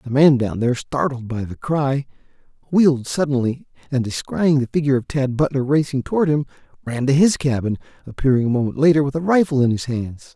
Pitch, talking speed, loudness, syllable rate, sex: 135 Hz, 195 wpm, -19 LUFS, 5.9 syllables/s, male